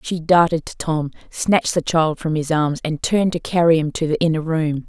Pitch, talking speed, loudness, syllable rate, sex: 160 Hz, 235 wpm, -19 LUFS, 5.3 syllables/s, female